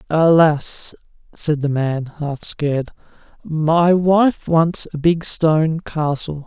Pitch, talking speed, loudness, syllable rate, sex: 155 Hz, 120 wpm, -18 LUFS, 3.2 syllables/s, male